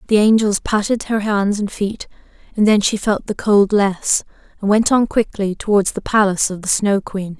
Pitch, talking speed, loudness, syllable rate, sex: 205 Hz, 205 wpm, -17 LUFS, 4.9 syllables/s, female